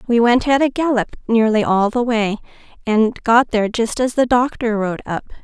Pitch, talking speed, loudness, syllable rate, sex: 230 Hz, 190 wpm, -17 LUFS, 4.8 syllables/s, female